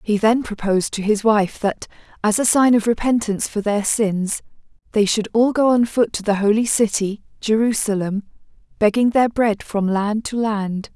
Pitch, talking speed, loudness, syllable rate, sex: 215 Hz, 180 wpm, -19 LUFS, 4.8 syllables/s, female